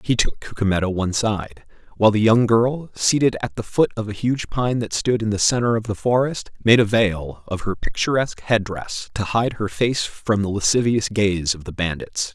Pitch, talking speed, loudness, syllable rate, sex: 105 Hz, 215 wpm, -20 LUFS, 5.0 syllables/s, male